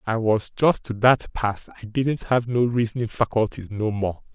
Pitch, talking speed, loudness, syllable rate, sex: 115 Hz, 195 wpm, -23 LUFS, 4.5 syllables/s, male